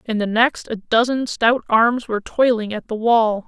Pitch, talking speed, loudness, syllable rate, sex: 230 Hz, 205 wpm, -18 LUFS, 4.5 syllables/s, female